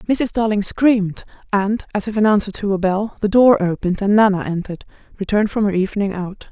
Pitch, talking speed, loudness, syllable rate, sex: 205 Hz, 205 wpm, -18 LUFS, 5.9 syllables/s, female